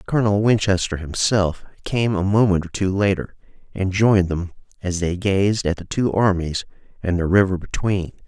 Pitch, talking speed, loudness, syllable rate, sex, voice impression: 95 Hz, 165 wpm, -20 LUFS, 5.0 syllables/s, male, masculine, adult-like, thick, powerful, intellectual, sincere, calm, friendly, reassuring, slightly wild, kind